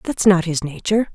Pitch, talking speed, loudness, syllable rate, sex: 185 Hz, 210 wpm, -18 LUFS, 6.0 syllables/s, female